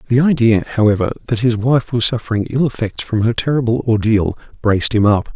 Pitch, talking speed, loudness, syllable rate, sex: 115 Hz, 190 wpm, -16 LUFS, 5.9 syllables/s, male